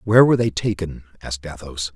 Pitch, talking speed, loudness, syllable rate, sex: 90 Hz, 185 wpm, -21 LUFS, 6.6 syllables/s, male